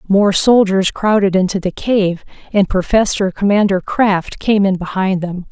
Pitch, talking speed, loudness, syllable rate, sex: 195 Hz, 150 wpm, -15 LUFS, 4.3 syllables/s, female